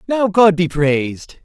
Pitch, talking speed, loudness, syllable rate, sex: 175 Hz, 165 wpm, -15 LUFS, 4.0 syllables/s, male